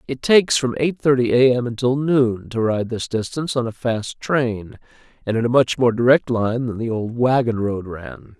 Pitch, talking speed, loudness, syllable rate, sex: 120 Hz, 215 wpm, -19 LUFS, 4.8 syllables/s, male